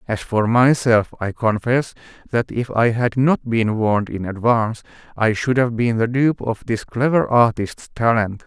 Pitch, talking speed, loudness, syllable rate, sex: 115 Hz, 175 wpm, -19 LUFS, 4.4 syllables/s, male